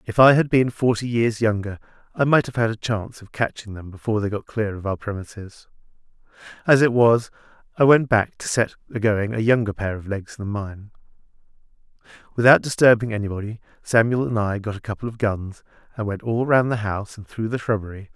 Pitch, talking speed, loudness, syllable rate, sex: 110 Hz, 200 wpm, -21 LUFS, 5.8 syllables/s, male